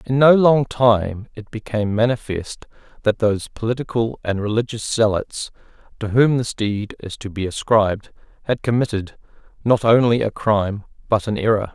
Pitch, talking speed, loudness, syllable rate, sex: 110 Hz, 155 wpm, -19 LUFS, 5.0 syllables/s, male